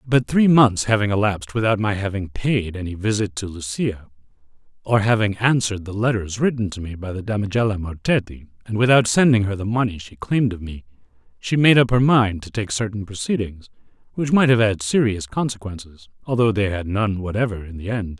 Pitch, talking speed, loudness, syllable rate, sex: 105 Hz, 190 wpm, -20 LUFS, 5.7 syllables/s, male